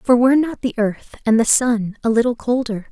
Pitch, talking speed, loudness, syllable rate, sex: 235 Hz, 225 wpm, -18 LUFS, 5.3 syllables/s, female